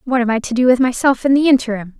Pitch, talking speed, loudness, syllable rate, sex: 245 Hz, 300 wpm, -15 LUFS, 7.0 syllables/s, female